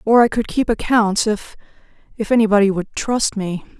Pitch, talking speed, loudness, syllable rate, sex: 215 Hz, 160 wpm, -18 LUFS, 5.0 syllables/s, female